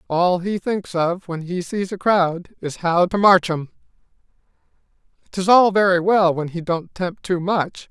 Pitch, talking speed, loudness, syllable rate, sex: 180 Hz, 180 wpm, -19 LUFS, 4.1 syllables/s, male